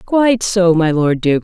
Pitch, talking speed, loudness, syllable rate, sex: 185 Hz, 210 wpm, -14 LUFS, 4.4 syllables/s, female